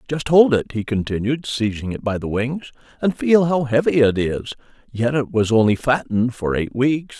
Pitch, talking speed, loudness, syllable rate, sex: 125 Hz, 200 wpm, -19 LUFS, 5.0 syllables/s, male